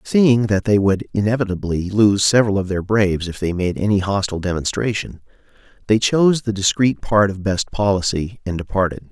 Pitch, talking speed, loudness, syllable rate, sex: 100 Hz, 170 wpm, -18 LUFS, 5.5 syllables/s, male